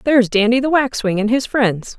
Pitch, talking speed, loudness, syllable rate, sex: 235 Hz, 210 wpm, -16 LUFS, 5.4 syllables/s, female